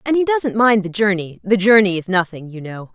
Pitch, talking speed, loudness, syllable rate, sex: 200 Hz, 245 wpm, -16 LUFS, 5.3 syllables/s, female